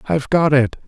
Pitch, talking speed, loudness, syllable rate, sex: 145 Hz, 205 wpm, -16 LUFS, 5.8 syllables/s, male